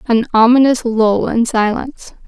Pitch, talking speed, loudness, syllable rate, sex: 235 Hz, 130 wpm, -13 LUFS, 4.5 syllables/s, female